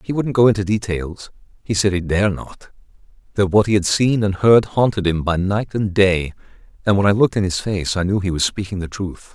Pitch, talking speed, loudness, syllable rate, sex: 100 Hz, 240 wpm, -18 LUFS, 5.5 syllables/s, male